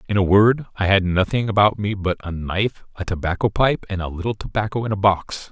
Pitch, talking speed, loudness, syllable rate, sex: 100 Hz, 230 wpm, -20 LUFS, 5.8 syllables/s, male